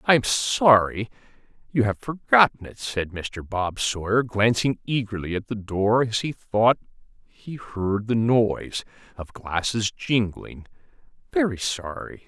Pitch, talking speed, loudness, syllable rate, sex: 115 Hz, 135 wpm, -23 LUFS, 4.0 syllables/s, male